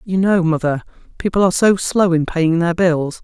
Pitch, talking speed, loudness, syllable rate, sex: 175 Hz, 205 wpm, -16 LUFS, 5.0 syllables/s, female